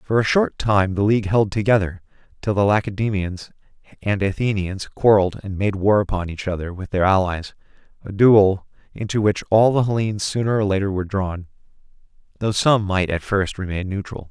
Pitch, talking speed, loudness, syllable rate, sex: 100 Hz, 175 wpm, -20 LUFS, 5.5 syllables/s, male